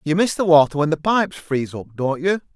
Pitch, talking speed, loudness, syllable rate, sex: 160 Hz, 260 wpm, -19 LUFS, 6.2 syllables/s, male